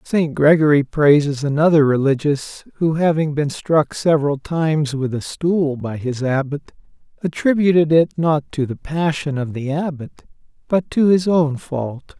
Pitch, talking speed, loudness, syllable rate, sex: 150 Hz, 150 wpm, -18 LUFS, 4.5 syllables/s, male